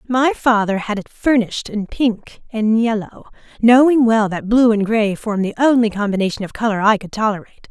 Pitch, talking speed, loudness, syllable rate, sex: 220 Hz, 185 wpm, -17 LUFS, 5.5 syllables/s, female